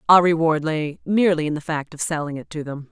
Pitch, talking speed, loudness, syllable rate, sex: 160 Hz, 245 wpm, -21 LUFS, 6.0 syllables/s, female